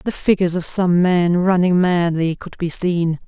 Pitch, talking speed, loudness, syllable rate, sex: 175 Hz, 185 wpm, -17 LUFS, 4.6 syllables/s, female